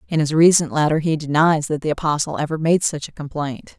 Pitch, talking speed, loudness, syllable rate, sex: 155 Hz, 220 wpm, -19 LUFS, 5.8 syllables/s, female